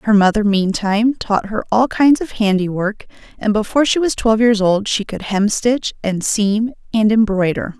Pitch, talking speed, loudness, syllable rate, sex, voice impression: 215 Hz, 175 wpm, -16 LUFS, 4.8 syllables/s, female, feminine, adult-like, slightly clear, slightly intellectual, reassuring